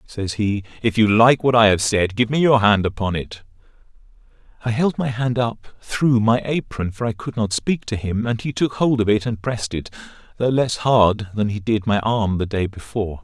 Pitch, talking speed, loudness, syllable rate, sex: 110 Hz, 225 wpm, -20 LUFS, 5.0 syllables/s, male